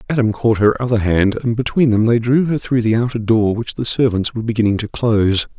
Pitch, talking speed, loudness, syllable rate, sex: 115 Hz, 235 wpm, -16 LUFS, 5.9 syllables/s, male